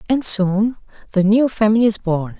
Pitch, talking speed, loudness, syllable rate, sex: 210 Hz, 175 wpm, -16 LUFS, 4.8 syllables/s, female